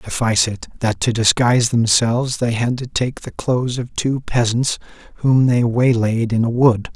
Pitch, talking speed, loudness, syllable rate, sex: 120 Hz, 180 wpm, -17 LUFS, 4.8 syllables/s, male